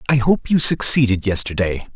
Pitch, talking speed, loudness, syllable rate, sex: 120 Hz, 155 wpm, -16 LUFS, 5.2 syllables/s, male